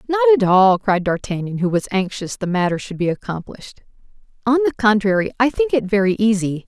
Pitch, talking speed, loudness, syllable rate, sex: 205 Hz, 190 wpm, -18 LUFS, 5.8 syllables/s, female